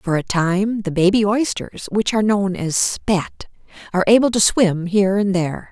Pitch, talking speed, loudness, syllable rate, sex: 200 Hz, 170 wpm, -18 LUFS, 4.8 syllables/s, female